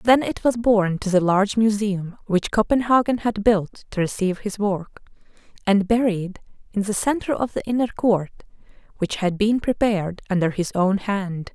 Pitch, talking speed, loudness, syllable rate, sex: 205 Hz, 170 wpm, -21 LUFS, 4.9 syllables/s, female